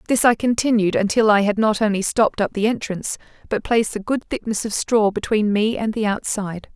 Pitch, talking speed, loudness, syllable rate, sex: 215 Hz, 215 wpm, -20 LUFS, 5.8 syllables/s, female